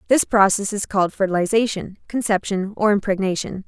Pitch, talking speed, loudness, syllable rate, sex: 200 Hz, 130 wpm, -20 LUFS, 5.7 syllables/s, female